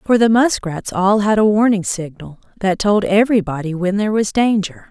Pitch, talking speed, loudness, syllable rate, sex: 200 Hz, 185 wpm, -16 LUFS, 5.2 syllables/s, female